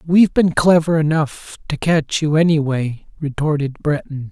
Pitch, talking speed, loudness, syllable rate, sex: 155 Hz, 140 wpm, -17 LUFS, 4.6 syllables/s, male